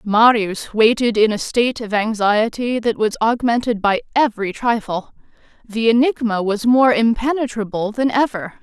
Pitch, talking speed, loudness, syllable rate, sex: 225 Hz, 140 wpm, -17 LUFS, 4.7 syllables/s, female